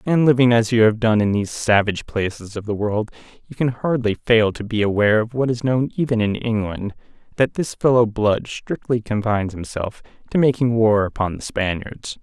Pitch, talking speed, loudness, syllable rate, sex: 110 Hz, 195 wpm, -20 LUFS, 5.3 syllables/s, male